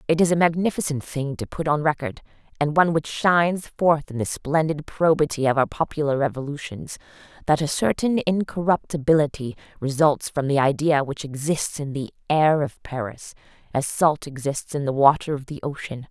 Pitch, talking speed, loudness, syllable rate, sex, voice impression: 150 Hz, 170 wpm, -22 LUFS, 5.2 syllables/s, female, feminine, adult-like, tensed, hard, fluent, intellectual, elegant, lively, slightly strict, sharp